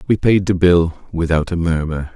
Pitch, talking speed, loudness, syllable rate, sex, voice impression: 85 Hz, 195 wpm, -17 LUFS, 4.6 syllables/s, male, very masculine, very adult-like, slightly thick, cool, slightly refreshing, sincere